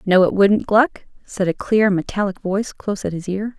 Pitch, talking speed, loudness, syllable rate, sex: 200 Hz, 220 wpm, -19 LUFS, 5.1 syllables/s, female